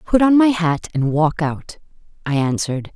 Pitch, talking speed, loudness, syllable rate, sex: 170 Hz, 185 wpm, -18 LUFS, 4.7 syllables/s, female